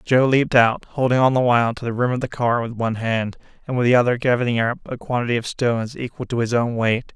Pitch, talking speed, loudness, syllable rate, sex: 120 Hz, 260 wpm, -20 LUFS, 6.3 syllables/s, male